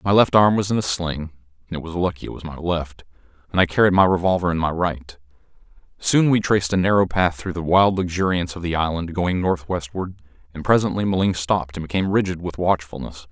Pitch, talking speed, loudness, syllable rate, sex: 90 Hz, 205 wpm, -20 LUFS, 5.5 syllables/s, male